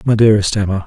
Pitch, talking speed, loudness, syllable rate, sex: 105 Hz, 210 wpm, -14 LUFS, 7.8 syllables/s, male